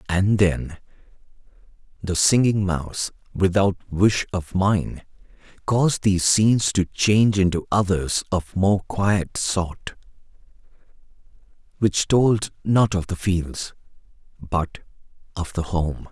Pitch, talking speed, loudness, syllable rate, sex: 95 Hz, 110 wpm, -21 LUFS, 3.7 syllables/s, male